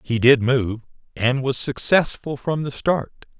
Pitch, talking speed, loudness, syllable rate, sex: 130 Hz, 160 wpm, -20 LUFS, 4.1 syllables/s, male